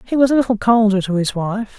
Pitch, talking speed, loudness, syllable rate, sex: 215 Hz, 270 wpm, -16 LUFS, 6.3 syllables/s, female